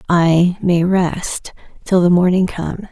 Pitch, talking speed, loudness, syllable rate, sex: 175 Hz, 145 wpm, -15 LUFS, 3.8 syllables/s, female